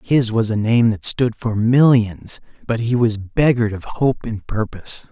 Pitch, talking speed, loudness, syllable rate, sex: 115 Hz, 190 wpm, -18 LUFS, 4.5 syllables/s, male